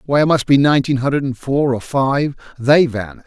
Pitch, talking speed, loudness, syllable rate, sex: 135 Hz, 220 wpm, -16 LUFS, 5.9 syllables/s, male